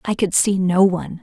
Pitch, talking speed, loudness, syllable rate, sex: 190 Hz, 245 wpm, -17 LUFS, 5.3 syllables/s, female